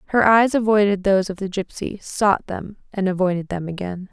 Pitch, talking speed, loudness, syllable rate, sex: 195 Hz, 190 wpm, -20 LUFS, 5.4 syllables/s, female